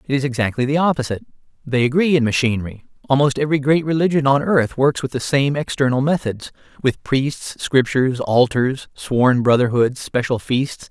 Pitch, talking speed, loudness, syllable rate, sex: 130 Hz, 160 wpm, -18 LUFS, 5.3 syllables/s, male